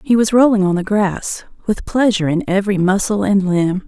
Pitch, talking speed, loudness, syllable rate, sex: 200 Hz, 200 wpm, -16 LUFS, 5.4 syllables/s, female